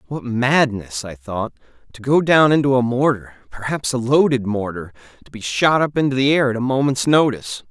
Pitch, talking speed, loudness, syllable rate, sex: 125 Hz, 195 wpm, -18 LUFS, 5.3 syllables/s, male